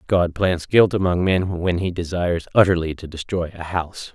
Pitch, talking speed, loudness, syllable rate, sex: 90 Hz, 190 wpm, -20 LUFS, 5.1 syllables/s, male